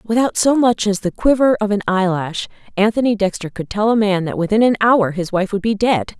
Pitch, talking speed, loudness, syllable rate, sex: 205 Hz, 230 wpm, -17 LUFS, 5.4 syllables/s, female